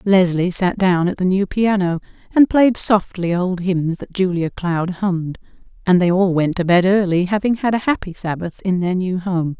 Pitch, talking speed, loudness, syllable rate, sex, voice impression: 185 Hz, 200 wpm, -18 LUFS, 4.7 syllables/s, female, very feminine, adult-like, slightly middle-aged, very thin, tensed, slightly powerful, very weak, bright, hard, cute, very intellectual, very refreshing, very sincere, very calm, very friendly, very reassuring, very unique, elegant, very wild, lively, very kind, modest